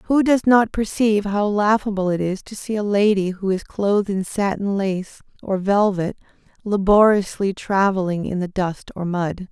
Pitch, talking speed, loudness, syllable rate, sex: 200 Hz, 170 wpm, -20 LUFS, 4.6 syllables/s, female